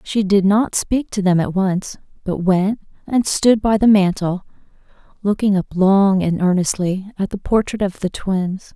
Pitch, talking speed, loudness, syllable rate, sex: 195 Hz, 180 wpm, -17 LUFS, 4.3 syllables/s, female